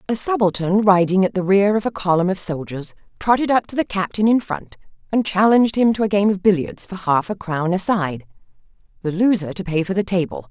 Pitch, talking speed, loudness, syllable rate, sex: 190 Hz, 225 wpm, -19 LUFS, 5.7 syllables/s, female